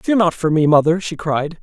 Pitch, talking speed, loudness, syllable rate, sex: 165 Hz, 260 wpm, -16 LUFS, 5.1 syllables/s, male